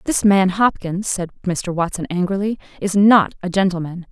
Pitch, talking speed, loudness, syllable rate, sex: 190 Hz, 160 wpm, -18 LUFS, 4.9 syllables/s, female